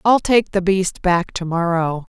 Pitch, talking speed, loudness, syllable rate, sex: 185 Hz, 170 wpm, -18 LUFS, 4.0 syllables/s, female